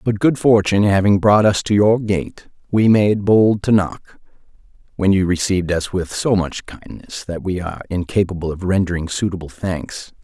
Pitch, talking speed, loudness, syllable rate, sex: 95 Hz, 175 wpm, -17 LUFS, 4.9 syllables/s, male